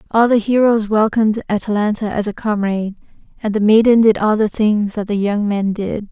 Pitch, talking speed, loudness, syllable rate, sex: 210 Hz, 195 wpm, -16 LUFS, 5.4 syllables/s, female